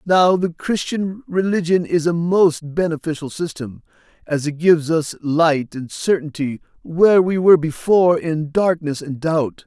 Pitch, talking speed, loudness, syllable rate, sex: 165 Hz, 150 wpm, -18 LUFS, 4.4 syllables/s, male